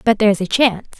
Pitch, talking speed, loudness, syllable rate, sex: 215 Hz, 240 wpm, -16 LUFS, 7.4 syllables/s, female